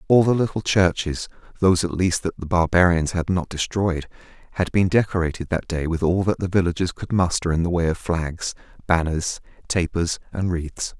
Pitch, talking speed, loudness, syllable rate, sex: 85 Hz, 175 wpm, -22 LUFS, 5.2 syllables/s, male